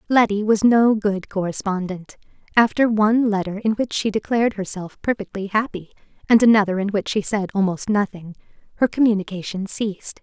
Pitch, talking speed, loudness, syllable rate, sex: 205 Hz, 155 wpm, -20 LUFS, 5.5 syllables/s, female